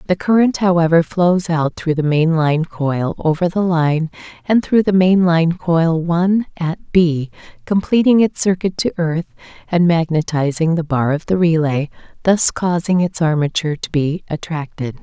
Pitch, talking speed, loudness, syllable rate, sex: 170 Hz, 165 wpm, -16 LUFS, 4.5 syllables/s, female